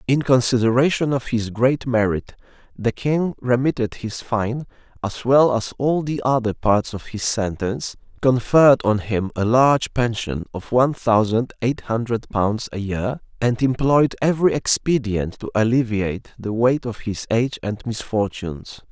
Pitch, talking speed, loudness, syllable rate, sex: 120 Hz, 150 wpm, -20 LUFS, 4.6 syllables/s, male